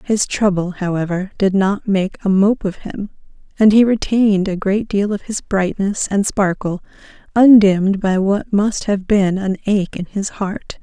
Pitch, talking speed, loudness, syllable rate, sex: 200 Hz, 175 wpm, -16 LUFS, 4.3 syllables/s, female